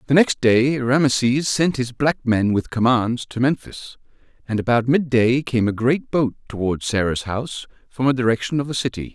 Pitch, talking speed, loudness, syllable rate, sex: 125 Hz, 185 wpm, -20 LUFS, 5.0 syllables/s, male